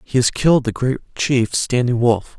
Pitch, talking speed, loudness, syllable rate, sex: 125 Hz, 200 wpm, -18 LUFS, 4.8 syllables/s, male